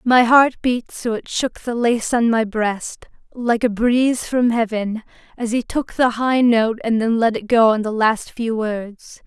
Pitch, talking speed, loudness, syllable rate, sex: 230 Hz, 205 wpm, -18 LUFS, 4.0 syllables/s, female